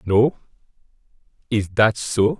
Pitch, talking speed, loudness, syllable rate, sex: 105 Hz, 100 wpm, -20 LUFS, 3.3 syllables/s, male